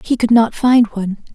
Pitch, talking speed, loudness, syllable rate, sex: 225 Hz, 225 wpm, -14 LUFS, 5.1 syllables/s, female